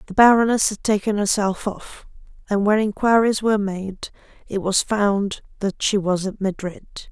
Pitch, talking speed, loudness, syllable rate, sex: 205 Hz, 160 wpm, -20 LUFS, 4.7 syllables/s, female